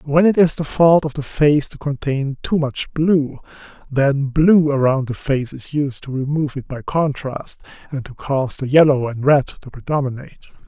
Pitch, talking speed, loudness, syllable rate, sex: 140 Hz, 190 wpm, -18 LUFS, 4.8 syllables/s, male